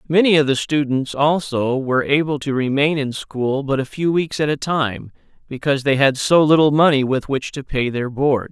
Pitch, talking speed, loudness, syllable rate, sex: 140 Hz, 210 wpm, -18 LUFS, 5.0 syllables/s, male